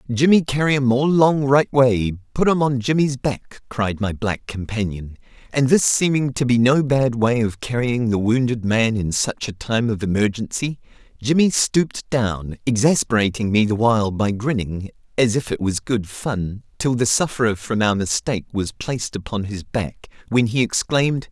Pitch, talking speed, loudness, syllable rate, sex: 120 Hz, 180 wpm, -20 LUFS, 4.7 syllables/s, male